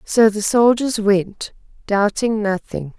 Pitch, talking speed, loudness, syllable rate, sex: 210 Hz, 120 wpm, -17 LUFS, 3.5 syllables/s, female